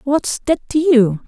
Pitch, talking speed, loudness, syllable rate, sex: 270 Hz, 190 wpm, -16 LUFS, 3.7 syllables/s, female